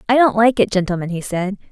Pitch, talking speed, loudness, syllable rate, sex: 205 Hz, 245 wpm, -17 LUFS, 6.3 syllables/s, female